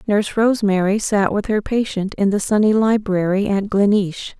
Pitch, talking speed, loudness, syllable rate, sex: 205 Hz, 165 wpm, -18 LUFS, 4.9 syllables/s, female